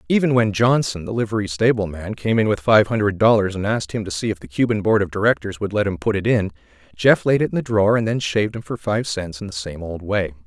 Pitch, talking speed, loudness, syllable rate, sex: 100 Hz, 275 wpm, -20 LUFS, 6.3 syllables/s, male